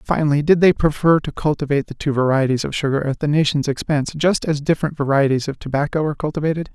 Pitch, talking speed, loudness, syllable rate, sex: 145 Hz, 205 wpm, -19 LUFS, 6.8 syllables/s, male